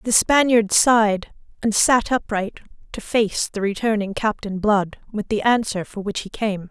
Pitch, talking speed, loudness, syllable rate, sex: 215 Hz, 170 wpm, -20 LUFS, 4.5 syllables/s, female